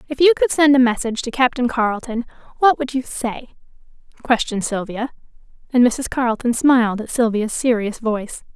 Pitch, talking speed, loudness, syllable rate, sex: 240 Hz, 160 wpm, -18 LUFS, 5.7 syllables/s, female